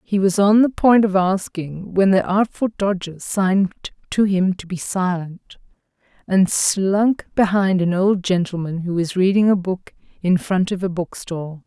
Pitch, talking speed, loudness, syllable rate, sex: 190 Hz, 175 wpm, -19 LUFS, 4.2 syllables/s, female